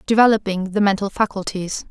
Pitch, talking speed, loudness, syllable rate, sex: 200 Hz, 125 wpm, -19 LUFS, 5.7 syllables/s, female